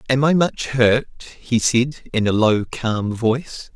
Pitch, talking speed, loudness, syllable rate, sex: 120 Hz, 175 wpm, -19 LUFS, 3.7 syllables/s, male